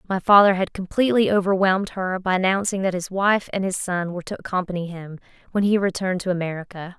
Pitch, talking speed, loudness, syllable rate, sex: 190 Hz, 200 wpm, -21 LUFS, 6.4 syllables/s, female